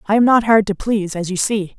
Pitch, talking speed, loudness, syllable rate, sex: 205 Hz, 305 wpm, -16 LUFS, 6.2 syllables/s, female